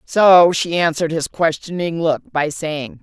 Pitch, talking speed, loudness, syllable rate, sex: 165 Hz, 160 wpm, -17 LUFS, 4.1 syllables/s, female